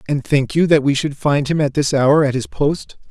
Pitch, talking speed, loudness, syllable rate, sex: 145 Hz, 270 wpm, -17 LUFS, 5.0 syllables/s, male